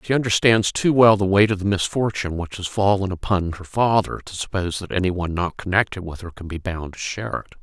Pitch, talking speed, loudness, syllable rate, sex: 95 Hz, 235 wpm, -21 LUFS, 6.1 syllables/s, male